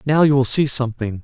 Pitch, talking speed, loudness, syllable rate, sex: 130 Hz, 245 wpm, -17 LUFS, 6.2 syllables/s, male